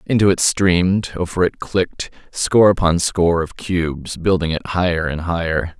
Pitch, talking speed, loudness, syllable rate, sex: 85 Hz, 165 wpm, -18 LUFS, 5.0 syllables/s, male